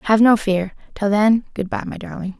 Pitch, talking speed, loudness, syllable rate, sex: 210 Hz, 225 wpm, -19 LUFS, 5.3 syllables/s, female